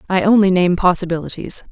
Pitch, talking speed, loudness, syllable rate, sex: 180 Hz, 140 wpm, -15 LUFS, 6.0 syllables/s, female